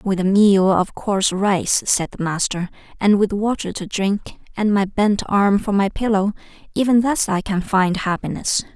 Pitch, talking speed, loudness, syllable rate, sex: 200 Hz, 180 wpm, -19 LUFS, 4.4 syllables/s, female